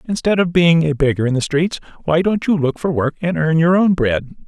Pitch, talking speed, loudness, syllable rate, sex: 160 Hz, 255 wpm, -17 LUFS, 5.6 syllables/s, male